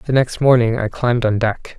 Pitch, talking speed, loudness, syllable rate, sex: 120 Hz, 235 wpm, -17 LUFS, 5.1 syllables/s, male